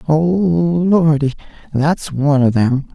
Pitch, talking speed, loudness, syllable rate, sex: 155 Hz, 120 wpm, -15 LUFS, 3.5 syllables/s, male